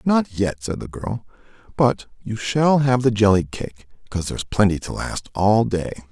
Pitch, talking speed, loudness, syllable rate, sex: 110 Hz, 185 wpm, -21 LUFS, 4.7 syllables/s, male